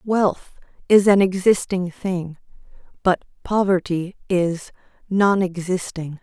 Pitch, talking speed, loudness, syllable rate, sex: 185 Hz, 85 wpm, -20 LUFS, 3.6 syllables/s, female